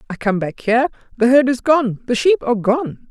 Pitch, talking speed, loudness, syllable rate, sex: 245 Hz, 230 wpm, -17 LUFS, 5.5 syllables/s, female